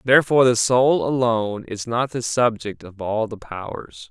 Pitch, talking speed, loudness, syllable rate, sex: 115 Hz, 175 wpm, -20 LUFS, 4.7 syllables/s, male